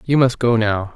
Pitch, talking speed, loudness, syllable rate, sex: 115 Hz, 255 wpm, -17 LUFS, 4.7 syllables/s, male